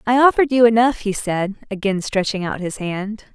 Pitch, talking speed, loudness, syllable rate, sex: 210 Hz, 200 wpm, -18 LUFS, 5.0 syllables/s, female